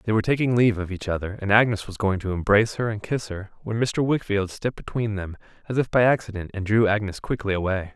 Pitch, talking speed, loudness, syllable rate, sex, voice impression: 105 Hz, 240 wpm, -23 LUFS, 6.5 syllables/s, male, masculine, adult-like, slightly powerful, clear, fluent, slightly cool, refreshing, friendly, lively, kind, slightly modest, light